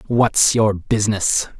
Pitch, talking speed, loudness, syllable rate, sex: 105 Hz, 115 wpm, -17 LUFS, 3.7 syllables/s, male